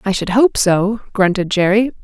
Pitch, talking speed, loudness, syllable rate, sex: 205 Hz, 175 wpm, -15 LUFS, 4.7 syllables/s, female